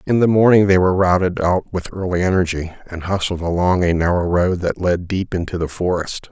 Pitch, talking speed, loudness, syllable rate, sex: 90 Hz, 210 wpm, -18 LUFS, 5.5 syllables/s, male